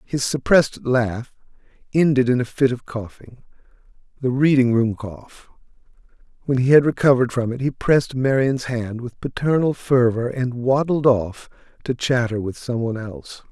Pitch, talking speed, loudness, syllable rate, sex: 125 Hz, 145 wpm, -20 LUFS, 4.9 syllables/s, male